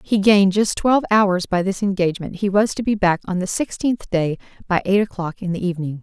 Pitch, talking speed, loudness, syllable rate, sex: 195 Hz, 230 wpm, -19 LUFS, 5.8 syllables/s, female